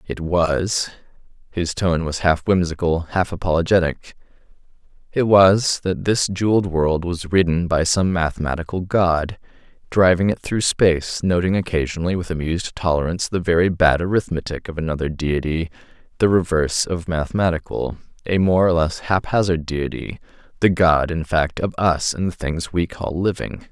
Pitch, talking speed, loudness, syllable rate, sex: 85 Hz, 140 wpm, -20 LUFS, 5.1 syllables/s, male